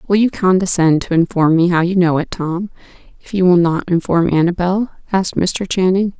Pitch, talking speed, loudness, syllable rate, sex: 180 Hz, 195 wpm, -15 LUFS, 5.1 syllables/s, female